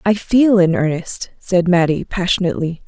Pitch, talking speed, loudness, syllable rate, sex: 185 Hz, 145 wpm, -16 LUFS, 4.9 syllables/s, female